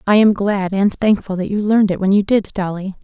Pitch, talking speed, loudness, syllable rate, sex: 200 Hz, 255 wpm, -16 LUFS, 5.8 syllables/s, female